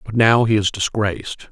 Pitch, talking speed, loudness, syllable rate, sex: 105 Hz, 200 wpm, -17 LUFS, 5.0 syllables/s, male